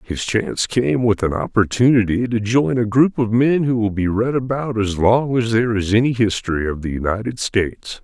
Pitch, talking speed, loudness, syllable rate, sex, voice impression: 115 Hz, 210 wpm, -18 LUFS, 5.2 syllables/s, male, masculine, old, slightly relaxed, powerful, hard, muffled, raspy, slightly sincere, calm, mature, wild, slightly lively, strict, slightly sharp